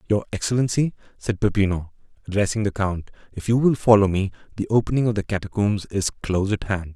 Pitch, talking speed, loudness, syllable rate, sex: 105 Hz, 180 wpm, -22 LUFS, 6.2 syllables/s, male